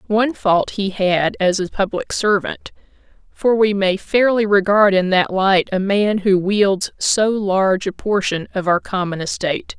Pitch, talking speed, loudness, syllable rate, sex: 195 Hz, 165 wpm, -17 LUFS, 4.3 syllables/s, female